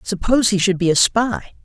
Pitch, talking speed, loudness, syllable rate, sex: 200 Hz, 220 wpm, -17 LUFS, 5.4 syllables/s, female